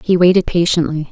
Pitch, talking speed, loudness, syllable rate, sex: 175 Hz, 160 wpm, -14 LUFS, 5.9 syllables/s, female